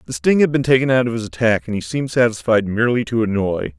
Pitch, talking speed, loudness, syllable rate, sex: 115 Hz, 255 wpm, -18 LUFS, 6.6 syllables/s, male